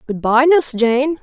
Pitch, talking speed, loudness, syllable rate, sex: 260 Hz, 195 wpm, -14 LUFS, 4.6 syllables/s, female